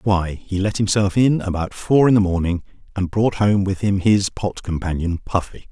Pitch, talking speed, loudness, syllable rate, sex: 100 Hz, 200 wpm, -19 LUFS, 4.8 syllables/s, male